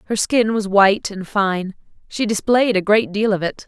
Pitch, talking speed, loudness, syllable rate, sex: 205 Hz, 210 wpm, -18 LUFS, 4.8 syllables/s, female